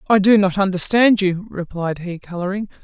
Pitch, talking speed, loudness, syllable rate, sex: 190 Hz, 170 wpm, -18 LUFS, 5.2 syllables/s, female